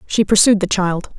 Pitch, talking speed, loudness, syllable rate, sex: 195 Hz, 200 wpm, -15 LUFS, 5.0 syllables/s, female